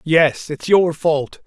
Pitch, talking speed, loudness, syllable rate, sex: 160 Hz, 165 wpm, -17 LUFS, 3.0 syllables/s, male